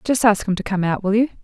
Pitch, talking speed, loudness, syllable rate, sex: 210 Hz, 335 wpm, -19 LUFS, 6.6 syllables/s, female